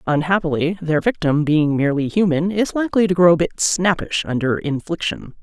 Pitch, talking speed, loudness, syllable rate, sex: 165 Hz, 165 wpm, -18 LUFS, 5.4 syllables/s, female